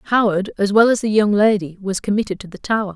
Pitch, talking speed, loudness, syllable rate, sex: 205 Hz, 245 wpm, -18 LUFS, 6.0 syllables/s, female